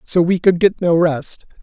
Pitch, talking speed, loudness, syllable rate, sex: 175 Hz, 220 wpm, -16 LUFS, 4.4 syllables/s, male